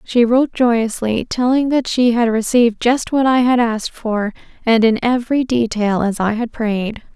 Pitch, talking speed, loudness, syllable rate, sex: 235 Hz, 185 wpm, -16 LUFS, 4.8 syllables/s, female